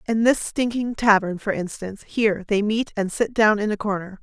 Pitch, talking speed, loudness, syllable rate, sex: 210 Hz, 215 wpm, -22 LUFS, 5.3 syllables/s, female